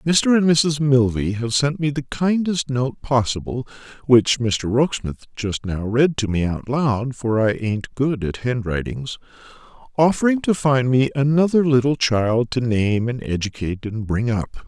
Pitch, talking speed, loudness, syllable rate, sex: 125 Hz, 170 wpm, -20 LUFS, 3.4 syllables/s, male